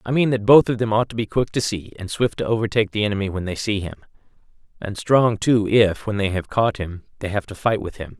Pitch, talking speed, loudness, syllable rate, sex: 105 Hz, 270 wpm, -21 LUFS, 5.9 syllables/s, male